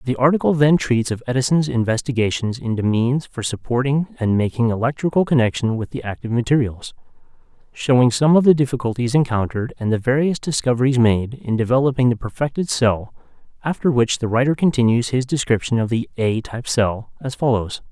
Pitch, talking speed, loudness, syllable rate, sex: 125 Hz, 165 wpm, -19 LUFS, 5.8 syllables/s, male